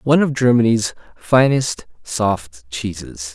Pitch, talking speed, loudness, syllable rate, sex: 115 Hz, 110 wpm, -18 LUFS, 3.8 syllables/s, male